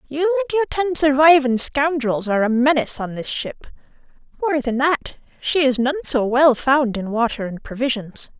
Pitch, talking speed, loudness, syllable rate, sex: 270 Hz, 180 wpm, -19 LUFS, 5.1 syllables/s, female